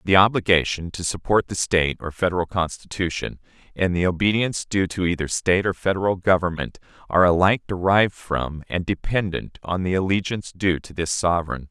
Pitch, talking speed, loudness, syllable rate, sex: 90 Hz, 165 wpm, -22 LUFS, 5.8 syllables/s, male